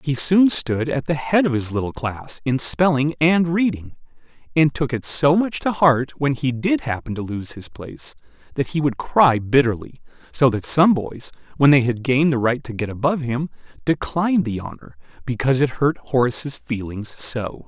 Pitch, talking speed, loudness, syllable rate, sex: 135 Hz, 195 wpm, -20 LUFS, 4.9 syllables/s, male